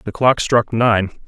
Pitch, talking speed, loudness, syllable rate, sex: 115 Hz, 190 wpm, -16 LUFS, 3.7 syllables/s, male